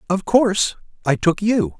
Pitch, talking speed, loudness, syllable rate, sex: 195 Hz, 170 wpm, -19 LUFS, 4.6 syllables/s, male